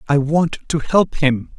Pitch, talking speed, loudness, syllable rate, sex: 150 Hz, 190 wpm, -18 LUFS, 3.9 syllables/s, male